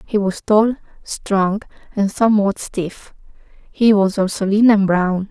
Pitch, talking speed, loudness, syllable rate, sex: 200 Hz, 145 wpm, -17 LUFS, 3.9 syllables/s, female